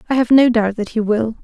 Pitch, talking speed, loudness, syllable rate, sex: 230 Hz, 295 wpm, -15 LUFS, 5.8 syllables/s, female